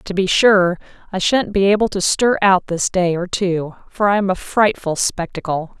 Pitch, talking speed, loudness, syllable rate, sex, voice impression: 190 Hz, 205 wpm, -17 LUFS, 4.6 syllables/s, female, slightly feminine, very gender-neutral, very adult-like, middle-aged, slightly thin, tensed, slightly powerful, slightly bright, hard, clear, very fluent, slightly cool, very intellectual, very sincere, very calm, slightly friendly, reassuring, lively, strict